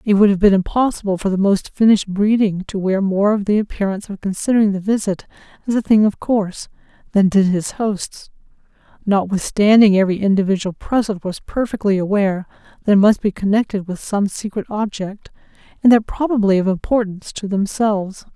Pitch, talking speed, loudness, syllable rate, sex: 205 Hz, 170 wpm, -17 LUFS, 5.8 syllables/s, female